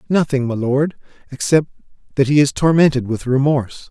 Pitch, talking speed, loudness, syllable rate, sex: 135 Hz, 155 wpm, -17 LUFS, 5.6 syllables/s, male